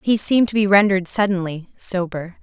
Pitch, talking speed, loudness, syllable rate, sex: 190 Hz, 175 wpm, -18 LUFS, 5.7 syllables/s, female